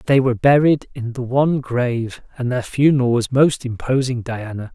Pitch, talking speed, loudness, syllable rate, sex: 125 Hz, 175 wpm, -18 LUFS, 5.2 syllables/s, male